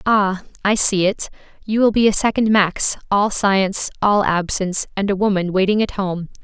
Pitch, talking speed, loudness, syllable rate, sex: 200 Hz, 175 wpm, -18 LUFS, 4.9 syllables/s, female